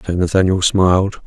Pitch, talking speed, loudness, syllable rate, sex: 95 Hz, 140 wpm, -15 LUFS, 5.4 syllables/s, male